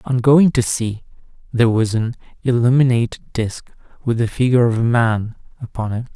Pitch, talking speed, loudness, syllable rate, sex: 120 Hz, 165 wpm, -18 LUFS, 5.3 syllables/s, male